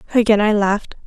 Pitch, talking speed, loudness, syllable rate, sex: 210 Hz, 170 wpm, -16 LUFS, 6.9 syllables/s, female